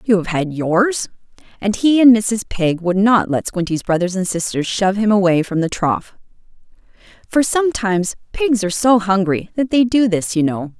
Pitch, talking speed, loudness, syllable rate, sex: 200 Hz, 190 wpm, -17 LUFS, 5.0 syllables/s, female